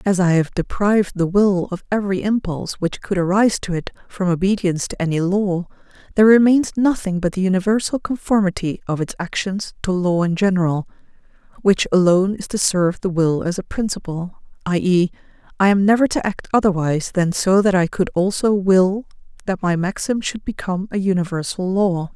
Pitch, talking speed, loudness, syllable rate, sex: 190 Hz, 180 wpm, -19 LUFS, 5.5 syllables/s, female